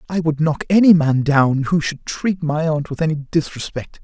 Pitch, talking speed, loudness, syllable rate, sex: 155 Hz, 210 wpm, -18 LUFS, 4.7 syllables/s, male